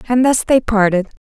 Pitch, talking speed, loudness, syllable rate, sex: 225 Hz, 195 wpm, -14 LUFS, 5.4 syllables/s, female